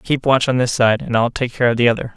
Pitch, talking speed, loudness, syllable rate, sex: 120 Hz, 335 wpm, -17 LUFS, 6.2 syllables/s, male